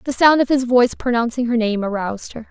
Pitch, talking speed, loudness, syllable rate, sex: 240 Hz, 240 wpm, -17 LUFS, 6.3 syllables/s, female